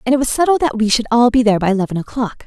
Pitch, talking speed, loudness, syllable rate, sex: 235 Hz, 315 wpm, -15 LUFS, 7.9 syllables/s, female